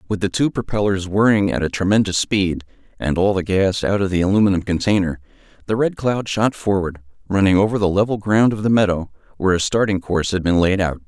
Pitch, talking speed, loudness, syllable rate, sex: 100 Hz, 210 wpm, -18 LUFS, 6.0 syllables/s, male